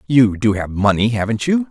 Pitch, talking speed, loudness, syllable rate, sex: 115 Hz, 210 wpm, -17 LUFS, 5.1 syllables/s, male